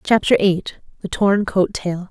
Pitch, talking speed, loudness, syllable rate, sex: 190 Hz, 145 wpm, -18 LUFS, 4.0 syllables/s, female